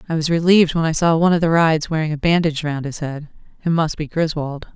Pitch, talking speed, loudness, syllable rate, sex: 160 Hz, 255 wpm, -18 LUFS, 6.7 syllables/s, female